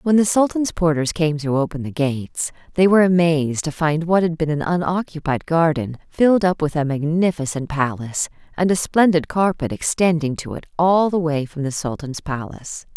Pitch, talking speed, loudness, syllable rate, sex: 160 Hz, 185 wpm, -19 LUFS, 5.3 syllables/s, female